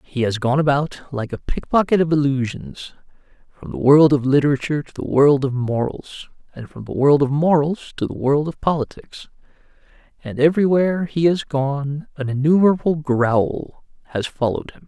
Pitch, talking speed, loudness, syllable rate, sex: 145 Hz, 165 wpm, -19 LUFS, 5.2 syllables/s, male